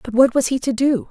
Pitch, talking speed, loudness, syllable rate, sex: 255 Hz, 325 wpm, -18 LUFS, 5.9 syllables/s, female